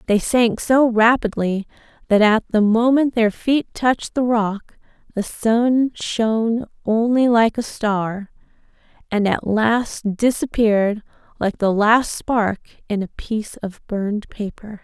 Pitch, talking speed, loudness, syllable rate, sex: 220 Hz, 140 wpm, -19 LUFS, 3.8 syllables/s, female